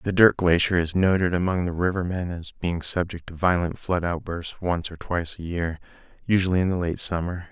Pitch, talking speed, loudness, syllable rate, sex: 90 Hz, 205 wpm, -24 LUFS, 5.4 syllables/s, male